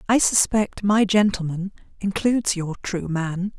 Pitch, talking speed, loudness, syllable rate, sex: 195 Hz, 135 wpm, -22 LUFS, 4.3 syllables/s, female